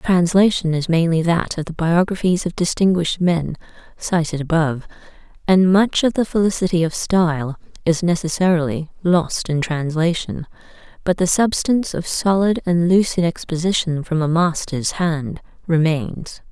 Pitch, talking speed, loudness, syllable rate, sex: 170 Hz, 140 wpm, -18 LUFS, 4.8 syllables/s, female